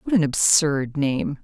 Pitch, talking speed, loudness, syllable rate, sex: 155 Hz, 165 wpm, -20 LUFS, 3.6 syllables/s, female